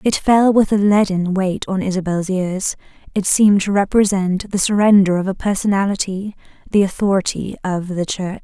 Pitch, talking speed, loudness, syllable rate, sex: 195 Hz, 165 wpm, -17 LUFS, 5.1 syllables/s, female